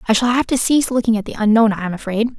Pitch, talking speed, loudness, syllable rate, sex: 225 Hz, 300 wpm, -17 LUFS, 7.5 syllables/s, female